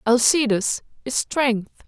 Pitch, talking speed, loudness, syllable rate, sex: 240 Hz, 95 wpm, -21 LUFS, 3.6 syllables/s, female